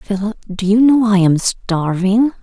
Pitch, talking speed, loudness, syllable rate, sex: 205 Hz, 175 wpm, -15 LUFS, 4.1 syllables/s, female